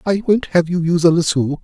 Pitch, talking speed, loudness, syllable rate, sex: 170 Hz, 255 wpm, -16 LUFS, 6.2 syllables/s, male